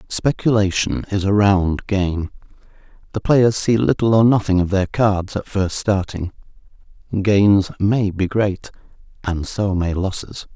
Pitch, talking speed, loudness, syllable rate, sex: 100 Hz, 135 wpm, -18 LUFS, 4.0 syllables/s, male